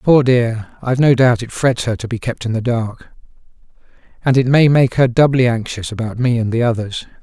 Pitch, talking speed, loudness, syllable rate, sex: 120 Hz, 215 wpm, -16 LUFS, 5.3 syllables/s, male